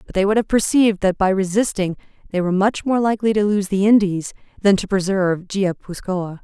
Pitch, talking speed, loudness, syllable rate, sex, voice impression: 195 Hz, 195 wpm, -19 LUFS, 5.8 syllables/s, female, feminine, adult-like, slightly refreshing, slightly sincere, calm, friendly